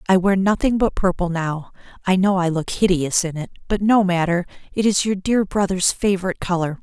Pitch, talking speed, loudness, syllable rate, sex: 185 Hz, 195 wpm, -20 LUFS, 5.5 syllables/s, female